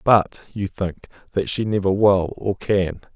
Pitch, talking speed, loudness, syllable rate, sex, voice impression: 100 Hz, 170 wpm, -21 LUFS, 3.9 syllables/s, male, very masculine, very adult-like, very middle-aged, very thick, slightly relaxed, powerful, dark, slightly soft, slightly muffled, fluent, slightly raspy, cool, intellectual, sincere, very calm, friendly, very reassuring, unique, slightly elegant, wild, slightly sweet, slightly lively, slightly kind, modest